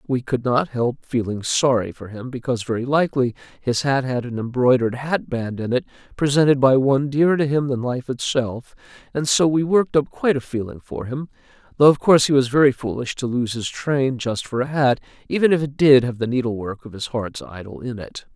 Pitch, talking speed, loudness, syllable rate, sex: 130 Hz, 220 wpm, -20 LUFS, 5.6 syllables/s, male